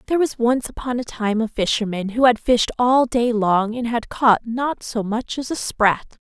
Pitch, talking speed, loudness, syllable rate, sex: 235 Hz, 220 wpm, -20 LUFS, 4.6 syllables/s, female